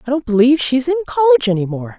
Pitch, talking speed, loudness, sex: 265 Hz, 240 wpm, -15 LUFS, female